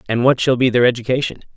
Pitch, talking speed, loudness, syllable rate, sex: 125 Hz, 230 wpm, -16 LUFS, 7.0 syllables/s, male